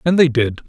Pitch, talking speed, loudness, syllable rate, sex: 140 Hz, 265 wpm, -16 LUFS, 5.6 syllables/s, male